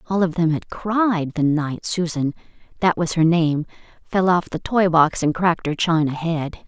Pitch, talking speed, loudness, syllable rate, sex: 170 Hz, 200 wpm, -20 LUFS, 4.3 syllables/s, female